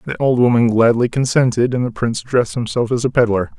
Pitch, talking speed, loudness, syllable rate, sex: 120 Hz, 220 wpm, -16 LUFS, 6.2 syllables/s, male